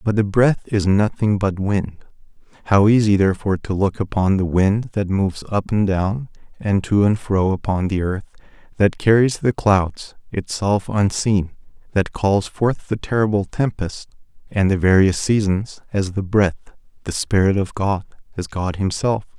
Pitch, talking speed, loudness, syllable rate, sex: 100 Hz, 165 wpm, -19 LUFS, 4.5 syllables/s, male